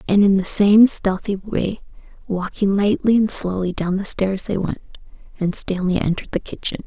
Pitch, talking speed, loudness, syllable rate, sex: 195 Hz, 175 wpm, -19 LUFS, 4.9 syllables/s, female